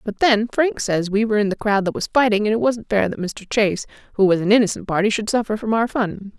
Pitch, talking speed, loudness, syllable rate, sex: 215 Hz, 275 wpm, -19 LUFS, 6.1 syllables/s, female